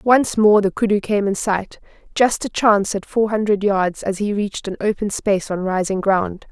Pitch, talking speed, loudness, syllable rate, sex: 205 Hz, 205 wpm, -19 LUFS, 5.0 syllables/s, female